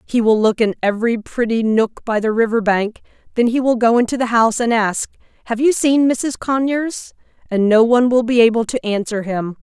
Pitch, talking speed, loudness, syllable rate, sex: 230 Hz, 210 wpm, -17 LUFS, 5.3 syllables/s, female